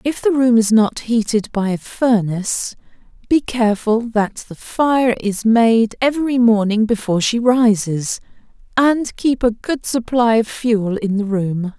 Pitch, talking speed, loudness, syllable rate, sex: 225 Hz, 160 wpm, -17 LUFS, 4.1 syllables/s, female